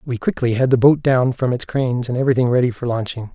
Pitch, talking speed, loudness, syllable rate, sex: 125 Hz, 250 wpm, -18 LUFS, 6.5 syllables/s, male